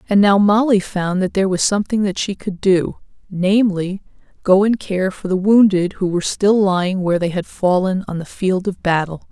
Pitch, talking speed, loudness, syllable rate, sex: 190 Hz, 200 wpm, -17 LUFS, 5.3 syllables/s, female